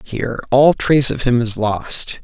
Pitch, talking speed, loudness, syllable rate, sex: 120 Hz, 190 wpm, -15 LUFS, 4.5 syllables/s, male